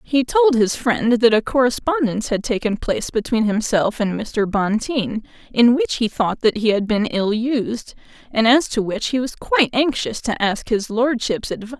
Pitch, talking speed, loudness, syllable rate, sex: 230 Hz, 195 wpm, -19 LUFS, 4.8 syllables/s, female